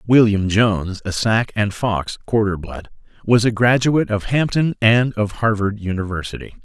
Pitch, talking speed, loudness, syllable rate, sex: 110 Hz, 155 wpm, -18 LUFS, 4.8 syllables/s, male